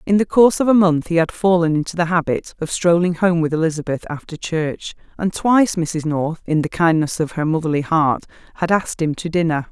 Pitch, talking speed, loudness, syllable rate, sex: 165 Hz, 215 wpm, -18 LUFS, 5.6 syllables/s, female